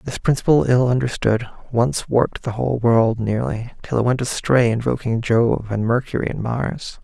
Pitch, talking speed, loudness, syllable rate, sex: 120 Hz, 170 wpm, -19 LUFS, 4.8 syllables/s, male